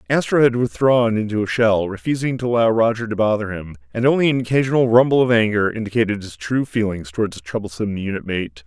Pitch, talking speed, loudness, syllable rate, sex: 110 Hz, 200 wpm, -19 LUFS, 6.3 syllables/s, male